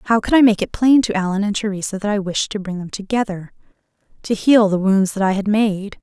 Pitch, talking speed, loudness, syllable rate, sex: 205 Hz, 250 wpm, -18 LUFS, 5.7 syllables/s, female